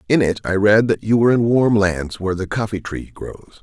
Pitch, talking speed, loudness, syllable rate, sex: 105 Hz, 250 wpm, -17 LUFS, 5.5 syllables/s, male